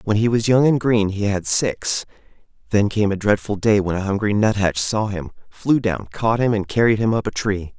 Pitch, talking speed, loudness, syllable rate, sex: 105 Hz, 230 wpm, -19 LUFS, 5.0 syllables/s, male